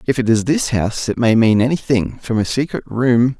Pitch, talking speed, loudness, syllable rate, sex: 120 Hz, 230 wpm, -17 LUFS, 5.4 syllables/s, male